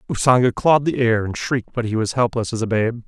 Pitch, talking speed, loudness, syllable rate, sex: 120 Hz, 255 wpm, -19 LUFS, 6.4 syllables/s, male